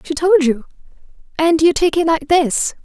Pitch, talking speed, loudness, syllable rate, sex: 320 Hz, 190 wpm, -15 LUFS, 4.6 syllables/s, female